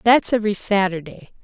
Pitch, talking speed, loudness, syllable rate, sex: 205 Hz, 125 wpm, -19 LUFS, 5.5 syllables/s, female